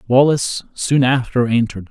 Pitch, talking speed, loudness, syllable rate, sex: 125 Hz, 125 wpm, -17 LUFS, 5.5 syllables/s, male